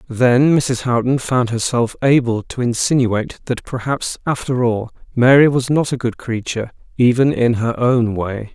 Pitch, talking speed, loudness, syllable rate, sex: 120 Hz, 160 wpm, -17 LUFS, 4.6 syllables/s, male